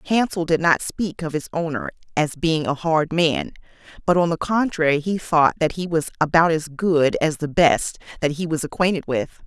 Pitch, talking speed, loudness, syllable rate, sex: 160 Hz, 205 wpm, -21 LUFS, 5.0 syllables/s, female